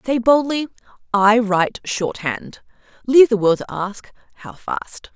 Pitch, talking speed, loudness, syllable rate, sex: 220 Hz, 140 wpm, -18 LUFS, 4.7 syllables/s, female